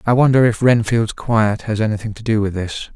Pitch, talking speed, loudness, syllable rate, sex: 110 Hz, 225 wpm, -17 LUFS, 5.5 syllables/s, male